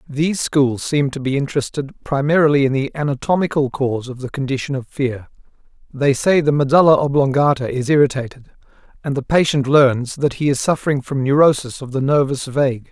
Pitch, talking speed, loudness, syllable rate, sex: 140 Hz, 170 wpm, -17 LUFS, 5.7 syllables/s, male